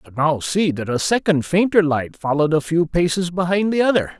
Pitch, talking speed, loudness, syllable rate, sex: 165 Hz, 230 wpm, -19 LUFS, 5.7 syllables/s, male